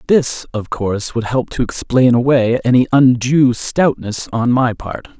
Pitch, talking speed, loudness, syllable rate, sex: 125 Hz, 160 wpm, -15 LUFS, 4.1 syllables/s, male